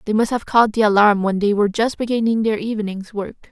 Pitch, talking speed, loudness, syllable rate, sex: 215 Hz, 240 wpm, -18 LUFS, 6.2 syllables/s, female